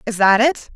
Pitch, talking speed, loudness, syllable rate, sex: 230 Hz, 240 wpm, -15 LUFS, 4.8 syllables/s, female